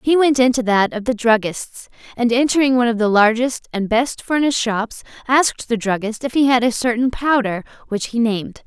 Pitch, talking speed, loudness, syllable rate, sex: 240 Hz, 200 wpm, -17 LUFS, 5.4 syllables/s, female